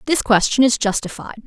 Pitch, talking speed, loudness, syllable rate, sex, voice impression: 235 Hz, 165 wpm, -17 LUFS, 5.4 syllables/s, female, feminine, adult-like, tensed, powerful, bright, clear, fluent, intellectual, friendly, slightly elegant, lively, slightly kind